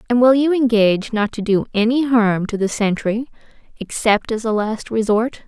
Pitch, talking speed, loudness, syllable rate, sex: 225 Hz, 185 wpm, -18 LUFS, 4.9 syllables/s, female